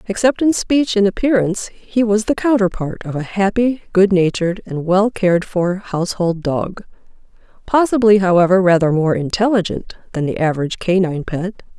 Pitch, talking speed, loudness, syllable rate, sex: 195 Hz, 145 wpm, -16 LUFS, 5.3 syllables/s, female